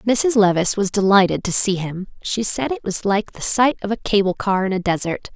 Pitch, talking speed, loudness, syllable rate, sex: 205 Hz, 235 wpm, -18 LUFS, 5.2 syllables/s, female